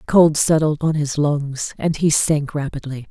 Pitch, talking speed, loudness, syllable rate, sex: 150 Hz, 195 wpm, -19 LUFS, 4.6 syllables/s, female